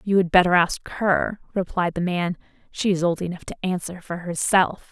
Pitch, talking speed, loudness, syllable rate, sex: 180 Hz, 195 wpm, -22 LUFS, 4.9 syllables/s, female